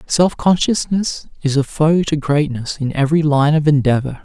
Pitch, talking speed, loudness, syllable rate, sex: 150 Hz, 170 wpm, -16 LUFS, 4.8 syllables/s, male